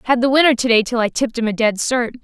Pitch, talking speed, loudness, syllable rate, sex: 235 Hz, 295 wpm, -16 LUFS, 7.0 syllables/s, female